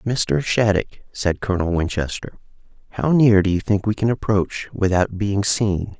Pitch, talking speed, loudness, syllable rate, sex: 100 Hz, 160 wpm, -20 LUFS, 4.6 syllables/s, male